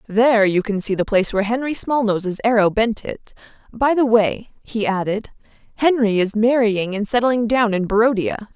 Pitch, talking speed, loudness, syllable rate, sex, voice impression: 220 Hz, 175 wpm, -18 LUFS, 5.1 syllables/s, female, very feminine, adult-like, very thin, tensed, very powerful, bright, slightly soft, very clear, very fluent, cool, intellectual, very refreshing, sincere, slightly calm, friendly, slightly reassuring, unique, elegant, wild, slightly sweet, very lively, strict, intense, slightly sharp, light